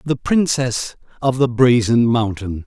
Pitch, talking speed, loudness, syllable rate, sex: 120 Hz, 135 wpm, -17 LUFS, 3.9 syllables/s, male